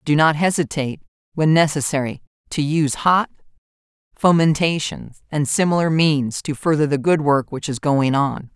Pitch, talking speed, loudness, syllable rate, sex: 150 Hz, 145 wpm, -19 LUFS, 4.9 syllables/s, female